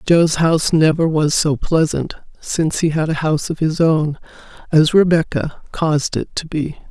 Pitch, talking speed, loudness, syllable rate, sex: 155 Hz, 175 wpm, -17 LUFS, 4.8 syllables/s, female